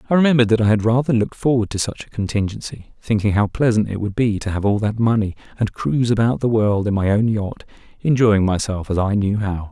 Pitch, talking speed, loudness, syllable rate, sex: 110 Hz, 235 wpm, -19 LUFS, 6.1 syllables/s, male